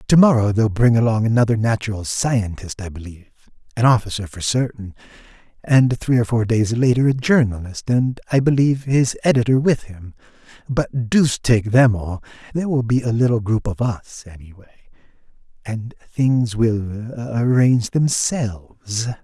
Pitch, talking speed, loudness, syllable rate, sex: 115 Hz, 150 wpm, -18 LUFS, 4.9 syllables/s, male